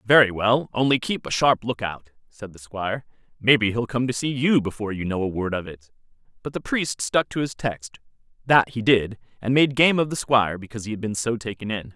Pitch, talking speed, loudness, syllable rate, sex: 115 Hz, 225 wpm, -22 LUFS, 5.5 syllables/s, male